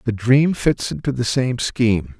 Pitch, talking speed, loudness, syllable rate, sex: 120 Hz, 190 wpm, -19 LUFS, 4.4 syllables/s, male